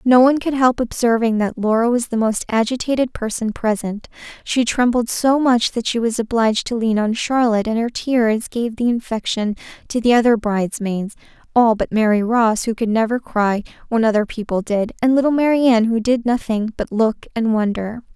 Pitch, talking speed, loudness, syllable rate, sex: 230 Hz, 185 wpm, -18 LUFS, 5.2 syllables/s, female